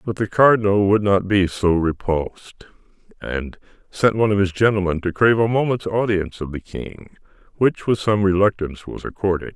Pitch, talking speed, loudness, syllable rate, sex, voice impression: 100 Hz, 175 wpm, -19 LUFS, 5.4 syllables/s, male, very masculine, middle-aged, thick, slightly muffled, calm, wild